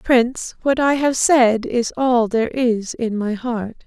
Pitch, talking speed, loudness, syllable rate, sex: 245 Hz, 185 wpm, -18 LUFS, 3.8 syllables/s, female